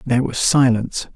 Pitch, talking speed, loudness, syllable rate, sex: 125 Hz, 155 wpm, -17 LUFS, 6.1 syllables/s, male